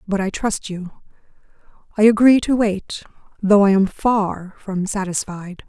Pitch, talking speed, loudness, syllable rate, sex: 200 Hz, 150 wpm, -18 LUFS, 4.1 syllables/s, female